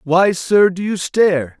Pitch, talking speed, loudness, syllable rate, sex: 180 Hz, 190 wpm, -15 LUFS, 4.0 syllables/s, male